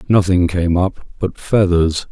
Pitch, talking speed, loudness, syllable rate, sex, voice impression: 90 Hz, 140 wpm, -16 LUFS, 3.9 syllables/s, male, very masculine, very middle-aged, thick, relaxed, weak, slightly bright, very soft, muffled, slightly fluent, raspy, slightly cool, very intellectual, slightly refreshing, sincere, very calm, very mature, friendly, reassuring, very unique, slightly elegant, slightly wild, sweet, slightly lively, very kind, very modest